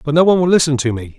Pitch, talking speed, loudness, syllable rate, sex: 150 Hz, 355 wpm, -14 LUFS, 8.3 syllables/s, male